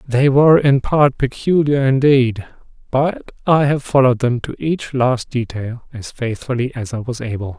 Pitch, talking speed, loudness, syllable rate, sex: 130 Hz, 165 wpm, -17 LUFS, 4.6 syllables/s, male